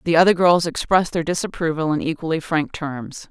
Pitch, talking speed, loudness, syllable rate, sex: 160 Hz, 180 wpm, -20 LUFS, 5.7 syllables/s, female